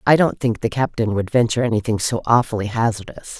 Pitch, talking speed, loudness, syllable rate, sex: 115 Hz, 195 wpm, -19 LUFS, 6.2 syllables/s, female